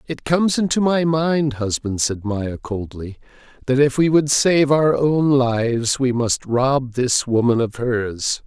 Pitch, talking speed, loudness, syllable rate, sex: 130 Hz, 170 wpm, -18 LUFS, 3.9 syllables/s, male